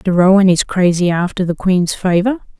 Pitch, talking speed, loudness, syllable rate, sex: 185 Hz, 185 wpm, -14 LUFS, 4.9 syllables/s, female